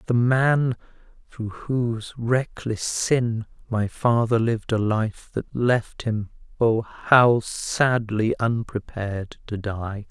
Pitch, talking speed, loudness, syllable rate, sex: 115 Hz, 120 wpm, -23 LUFS, 3.3 syllables/s, male